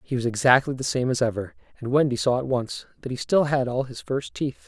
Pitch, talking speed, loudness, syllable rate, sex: 125 Hz, 255 wpm, -24 LUFS, 5.8 syllables/s, male